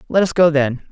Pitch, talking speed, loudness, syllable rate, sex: 155 Hz, 260 wpm, -15 LUFS, 5.6 syllables/s, male